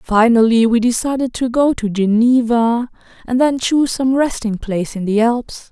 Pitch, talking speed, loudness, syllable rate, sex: 235 Hz, 170 wpm, -16 LUFS, 4.7 syllables/s, female